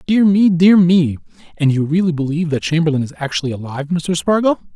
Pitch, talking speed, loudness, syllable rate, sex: 165 Hz, 165 wpm, -16 LUFS, 6.4 syllables/s, male